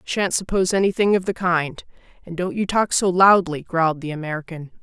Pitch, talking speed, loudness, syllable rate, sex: 175 Hz, 185 wpm, -20 LUFS, 5.6 syllables/s, female